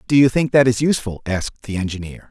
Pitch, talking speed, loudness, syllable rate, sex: 115 Hz, 235 wpm, -18 LUFS, 6.6 syllables/s, male